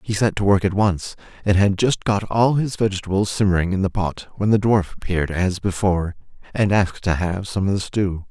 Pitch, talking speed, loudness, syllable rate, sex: 100 Hz, 225 wpm, -20 LUFS, 5.5 syllables/s, male